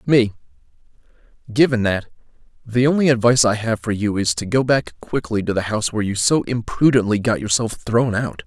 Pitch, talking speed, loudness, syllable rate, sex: 115 Hz, 185 wpm, -19 LUFS, 5.6 syllables/s, male